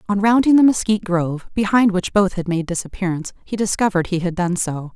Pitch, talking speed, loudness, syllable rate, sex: 190 Hz, 205 wpm, -19 LUFS, 6.3 syllables/s, female